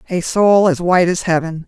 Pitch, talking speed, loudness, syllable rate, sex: 175 Hz, 215 wpm, -14 LUFS, 5.4 syllables/s, female